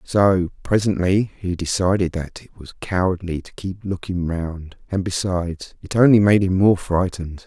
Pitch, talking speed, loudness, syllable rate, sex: 90 Hz, 160 wpm, -20 LUFS, 4.6 syllables/s, male